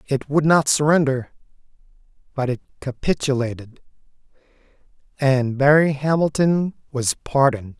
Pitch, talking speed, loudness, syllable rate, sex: 140 Hz, 90 wpm, -20 LUFS, 4.8 syllables/s, male